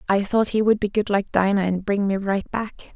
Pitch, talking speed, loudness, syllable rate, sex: 200 Hz, 265 wpm, -22 LUFS, 5.4 syllables/s, female